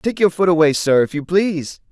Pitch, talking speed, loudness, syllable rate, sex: 165 Hz, 250 wpm, -17 LUFS, 5.5 syllables/s, male